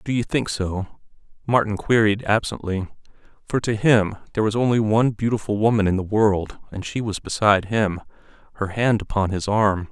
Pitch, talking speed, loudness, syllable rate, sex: 105 Hz, 175 wpm, -21 LUFS, 5.3 syllables/s, male